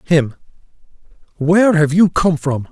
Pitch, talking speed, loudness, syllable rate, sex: 160 Hz, 135 wpm, -14 LUFS, 4.4 syllables/s, male